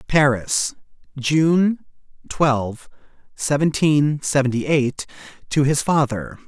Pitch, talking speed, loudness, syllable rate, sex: 140 Hz, 85 wpm, -20 LUFS, 3.4 syllables/s, male